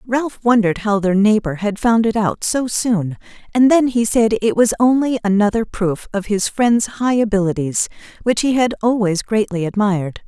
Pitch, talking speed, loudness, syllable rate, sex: 215 Hz, 180 wpm, -17 LUFS, 4.8 syllables/s, female